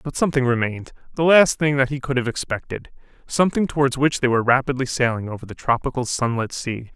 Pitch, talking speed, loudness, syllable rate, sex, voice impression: 130 Hz, 180 wpm, -20 LUFS, 6.4 syllables/s, male, very masculine, very adult-like, very middle-aged, very thick, tensed, powerful, bright, hard, slightly muffled, fluent, cool, very intellectual, slightly refreshing, sincere, calm, very mature, friendly, reassuring, slightly unique, slightly wild, sweet, lively, kind